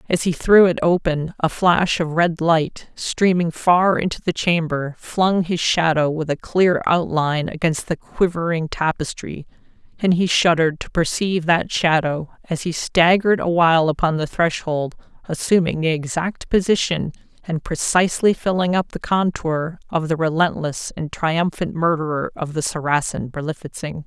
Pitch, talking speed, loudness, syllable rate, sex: 165 Hz, 145 wpm, -19 LUFS, 4.6 syllables/s, female